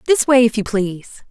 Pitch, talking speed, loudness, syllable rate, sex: 225 Hz, 230 wpm, -16 LUFS, 5.4 syllables/s, female